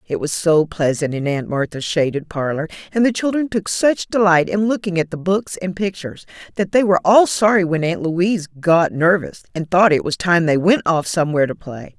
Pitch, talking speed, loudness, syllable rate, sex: 175 Hz, 215 wpm, -17 LUFS, 5.3 syllables/s, female